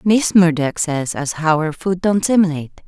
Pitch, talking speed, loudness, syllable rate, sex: 170 Hz, 190 wpm, -17 LUFS, 4.9 syllables/s, female